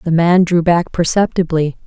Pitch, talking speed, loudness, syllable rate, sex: 170 Hz, 160 wpm, -14 LUFS, 4.7 syllables/s, female